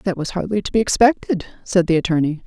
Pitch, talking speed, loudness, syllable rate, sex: 180 Hz, 220 wpm, -19 LUFS, 6.3 syllables/s, female